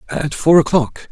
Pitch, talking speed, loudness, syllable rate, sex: 150 Hz, 160 wpm, -15 LUFS, 4.3 syllables/s, male